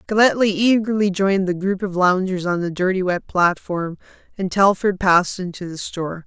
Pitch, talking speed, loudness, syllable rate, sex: 190 Hz, 170 wpm, -19 LUFS, 5.3 syllables/s, female